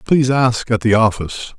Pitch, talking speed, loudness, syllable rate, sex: 115 Hz, 190 wpm, -16 LUFS, 5.4 syllables/s, male